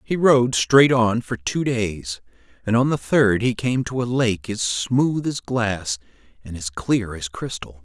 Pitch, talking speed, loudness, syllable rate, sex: 110 Hz, 190 wpm, -21 LUFS, 3.8 syllables/s, male